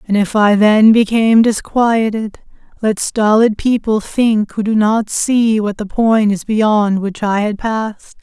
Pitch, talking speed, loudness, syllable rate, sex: 215 Hz, 170 wpm, -14 LUFS, 3.9 syllables/s, female